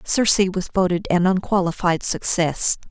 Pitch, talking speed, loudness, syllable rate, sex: 185 Hz, 125 wpm, -19 LUFS, 4.7 syllables/s, female